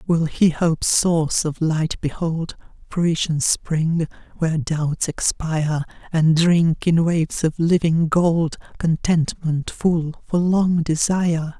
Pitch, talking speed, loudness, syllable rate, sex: 165 Hz, 125 wpm, -20 LUFS, 3.6 syllables/s, female